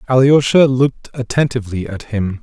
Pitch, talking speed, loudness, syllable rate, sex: 120 Hz, 125 wpm, -15 LUFS, 5.4 syllables/s, male